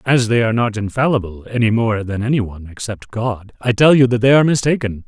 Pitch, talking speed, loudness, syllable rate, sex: 115 Hz, 225 wpm, -16 LUFS, 6.2 syllables/s, male